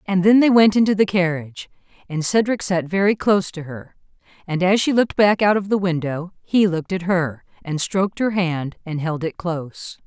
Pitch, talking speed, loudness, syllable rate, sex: 185 Hz, 210 wpm, -19 LUFS, 5.3 syllables/s, female